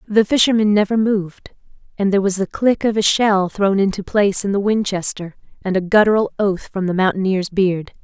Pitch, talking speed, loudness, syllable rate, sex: 200 Hz, 195 wpm, -17 LUFS, 5.5 syllables/s, female